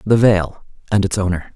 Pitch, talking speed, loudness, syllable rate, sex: 100 Hz, 195 wpm, -17 LUFS, 5.0 syllables/s, male